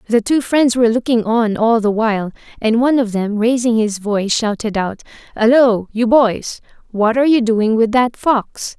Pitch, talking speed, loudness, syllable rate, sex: 230 Hz, 190 wpm, -15 LUFS, 4.8 syllables/s, female